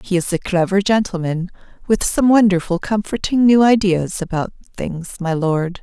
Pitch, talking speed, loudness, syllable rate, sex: 190 Hz, 155 wpm, -17 LUFS, 4.8 syllables/s, female